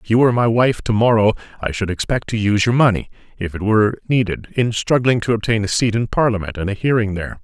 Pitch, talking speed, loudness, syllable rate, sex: 110 Hz, 240 wpm, -18 LUFS, 6.5 syllables/s, male